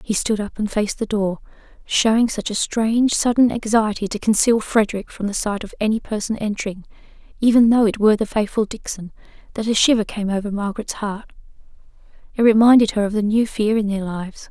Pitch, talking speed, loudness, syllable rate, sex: 215 Hz, 195 wpm, -19 LUFS, 6.0 syllables/s, female